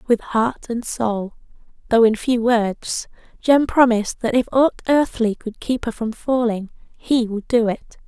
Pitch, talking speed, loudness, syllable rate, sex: 235 Hz, 170 wpm, -19 LUFS, 4.1 syllables/s, female